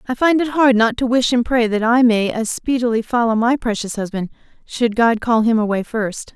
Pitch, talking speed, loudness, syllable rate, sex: 235 Hz, 225 wpm, -17 LUFS, 5.1 syllables/s, female